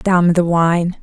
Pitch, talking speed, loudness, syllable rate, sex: 175 Hz, 175 wpm, -14 LUFS, 3.0 syllables/s, female